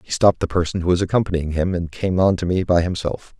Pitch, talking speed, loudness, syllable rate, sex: 90 Hz, 265 wpm, -20 LUFS, 6.4 syllables/s, male